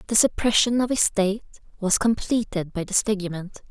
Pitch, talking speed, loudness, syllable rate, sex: 205 Hz, 145 wpm, -22 LUFS, 5.8 syllables/s, female